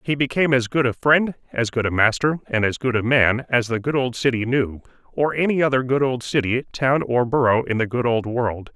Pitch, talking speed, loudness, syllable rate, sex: 125 Hz, 240 wpm, -20 LUFS, 5.4 syllables/s, male